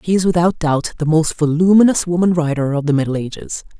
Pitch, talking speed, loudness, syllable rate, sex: 165 Hz, 205 wpm, -16 LUFS, 6.0 syllables/s, female